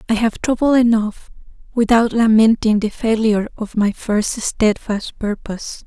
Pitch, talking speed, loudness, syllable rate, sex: 220 Hz, 135 wpm, -17 LUFS, 4.5 syllables/s, female